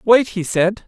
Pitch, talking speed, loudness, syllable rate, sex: 200 Hz, 205 wpm, -17 LUFS, 3.6 syllables/s, male